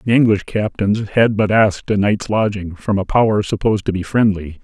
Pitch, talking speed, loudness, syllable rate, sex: 105 Hz, 205 wpm, -17 LUFS, 5.4 syllables/s, male